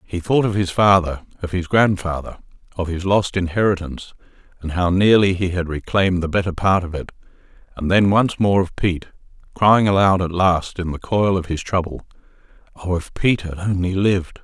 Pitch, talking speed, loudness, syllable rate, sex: 90 Hz, 185 wpm, -19 LUFS, 5.4 syllables/s, male